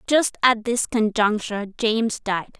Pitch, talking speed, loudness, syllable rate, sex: 225 Hz, 140 wpm, -21 LUFS, 4.5 syllables/s, female